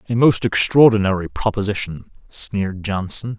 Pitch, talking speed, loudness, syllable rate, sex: 105 Hz, 105 wpm, -18 LUFS, 4.9 syllables/s, male